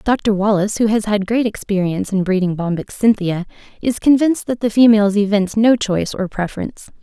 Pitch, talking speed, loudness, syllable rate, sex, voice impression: 210 Hz, 180 wpm, -17 LUFS, 6.0 syllables/s, female, very feminine, slightly young, slightly adult-like, very thin, tensed, slightly powerful, very bright, very hard, very clear, very fluent, cute, very intellectual, refreshing, sincere, very calm, very friendly, very reassuring, unique, elegant, slightly wild, very sweet, intense, slightly sharp